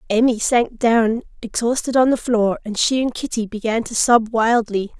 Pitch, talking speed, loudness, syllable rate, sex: 230 Hz, 180 wpm, -18 LUFS, 4.7 syllables/s, female